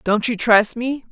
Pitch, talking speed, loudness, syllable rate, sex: 230 Hz, 215 wpm, -17 LUFS, 4.1 syllables/s, female